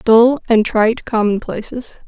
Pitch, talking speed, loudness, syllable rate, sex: 225 Hz, 115 wpm, -15 LUFS, 4.4 syllables/s, female